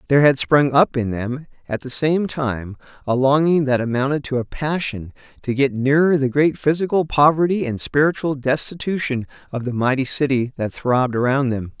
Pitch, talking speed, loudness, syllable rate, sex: 135 Hz, 180 wpm, -19 LUFS, 5.2 syllables/s, male